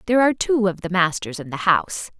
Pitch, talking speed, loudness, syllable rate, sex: 190 Hz, 245 wpm, -20 LUFS, 6.6 syllables/s, female